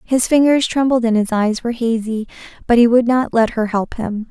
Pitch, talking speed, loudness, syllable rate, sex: 235 Hz, 225 wpm, -16 LUFS, 5.3 syllables/s, female